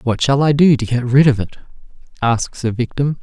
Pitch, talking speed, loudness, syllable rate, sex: 130 Hz, 225 wpm, -16 LUFS, 5.3 syllables/s, male